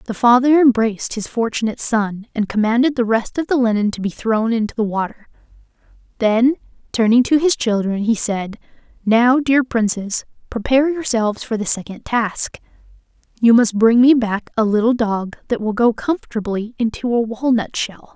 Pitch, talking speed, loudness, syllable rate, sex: 230 Hz, 170 wpm, -17 LUFS, 5.0 syllables/s, female